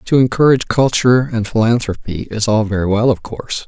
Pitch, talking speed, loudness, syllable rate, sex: 115 Hz, 180 wpm, -15 LUFS, 5.9 syllables/s, male